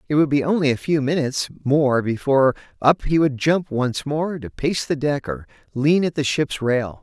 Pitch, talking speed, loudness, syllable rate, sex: 140 Hz, 215 wpm, -20 LUFS, 4.9 syllables/s, male